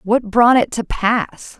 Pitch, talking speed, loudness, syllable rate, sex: 225 Hz, 190 wpm, -16 LUFS, 3.4 syllables/s, female